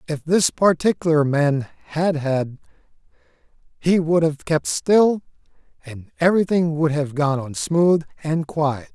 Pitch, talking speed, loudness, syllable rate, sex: 155 Hz, 135 wpm, -20 LUFS, 3.9 syllables/s, male